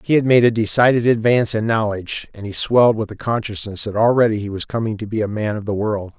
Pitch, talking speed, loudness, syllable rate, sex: 110 Hz, 250 wpm, -18 LUFS, 6.4 syllables/s, male